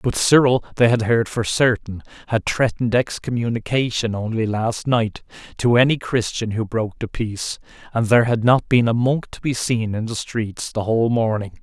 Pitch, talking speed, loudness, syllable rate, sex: 115 Hz, 185 wpm, -20 LUFS, 5.1 syllables/s, male